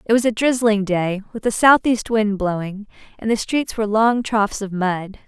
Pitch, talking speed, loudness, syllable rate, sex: 215 Hz, 205 wpm, -19 LUFS, 4.7 syllables/s, female